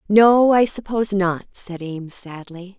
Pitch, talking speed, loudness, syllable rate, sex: 195 Hz, 150 wpm, -18 LUFS, 4.2 syllables/s, female